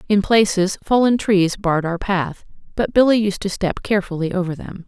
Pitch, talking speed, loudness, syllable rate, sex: 195 Hz, 185 wpm, -18 LUFS, 5.4 syllables/s, female